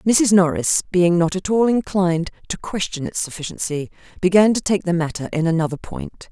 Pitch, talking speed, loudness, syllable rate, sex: 175 Hz, 180 wpm, -19 LUFS, 5.3 syllables/s, female